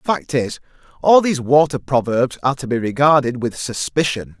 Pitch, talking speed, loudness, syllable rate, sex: 135 Hz, 165 wpm, -17 LUFS, 5.2 syllables/s, male